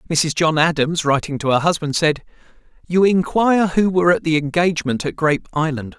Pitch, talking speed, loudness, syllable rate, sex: 160 Hz, 180 wpm, -18 LUFS, 5.7 syllables/s, male